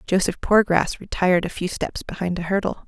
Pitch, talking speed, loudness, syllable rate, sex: 185 Hz, 190 wpm, -22 LUFS, 5.7 syllables/s, female